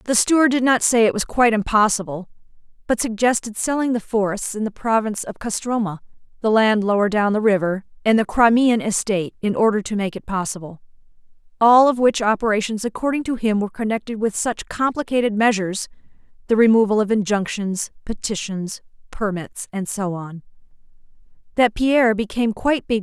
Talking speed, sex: 165 wpm, female